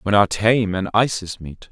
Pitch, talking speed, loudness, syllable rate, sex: 100 Hz, 210 wpm, -19 LUFS, 5.1 syllables/s, male